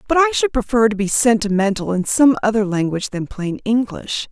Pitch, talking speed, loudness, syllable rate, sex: 220 Hz, 195 wpm, -18 LUFS, 5.5 syllables/s, female